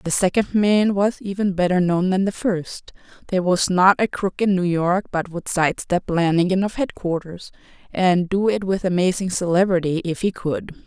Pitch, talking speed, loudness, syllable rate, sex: 185 Hz, 180 wpm, -20 LUFS, 4.7 syllables/s, female